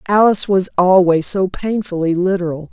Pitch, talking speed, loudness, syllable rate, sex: 185 Hz, 130 wpm, -15 LUFS, 5.2 syllables/s, female